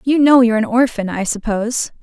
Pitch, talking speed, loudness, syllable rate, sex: 235 Hz, 210 wpm, -15 LUFS, 6.0 syllables/s, female